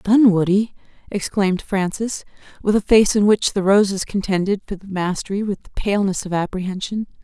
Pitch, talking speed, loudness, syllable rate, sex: 195 Hz, 160 wpm, -19 LUFS, 5.5 syllables/s, female